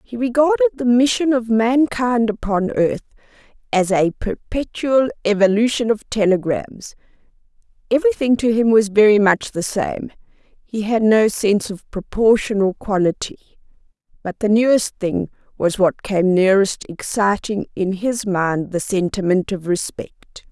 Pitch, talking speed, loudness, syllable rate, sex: 215 Hz, 135 wpm, -18 LUFS, 4.3 syllables/s, female